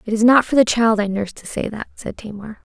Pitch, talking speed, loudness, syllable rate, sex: 220 Hz, 285 wpm, -18 LUFS, 6.1 syllables/s, female